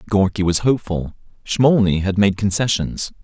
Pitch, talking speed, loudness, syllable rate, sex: 100 Hz, 130 wpm, -18 LUFS, 4.9 syllables/s, male